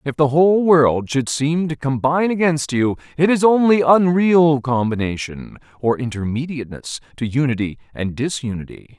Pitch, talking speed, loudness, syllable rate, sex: 140 Hz, 140 wpm, -18 LUFS, 4.9 syllables/s, male